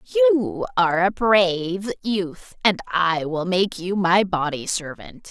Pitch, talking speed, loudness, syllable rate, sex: 190 Hz, 145 wpm, -21 LUFS, 3.5 syllables/s, female